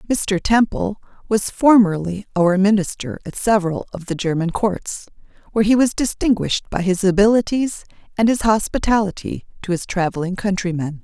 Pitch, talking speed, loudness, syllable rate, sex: 200 Hz, 140 wpm, -19 LUFS, 5.3 syllables/s, female